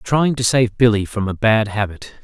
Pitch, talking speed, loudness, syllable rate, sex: 110 Hz, 215 wpm, -17 LUFS, 4.6 syllables/s, male